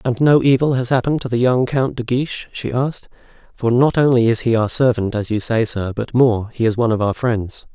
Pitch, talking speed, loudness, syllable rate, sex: 120 Hz, 240 wpm, -17 LUFS, 5.6 syllables/s, male